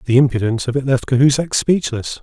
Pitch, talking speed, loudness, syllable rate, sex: 130 Hz, 190 wpm, -16 LUFS, 6.3 syllables/s, male